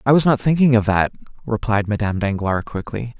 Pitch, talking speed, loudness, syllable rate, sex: 115 Hz, 190 wpm, -19 LUFS, 6.0 syllables/s, male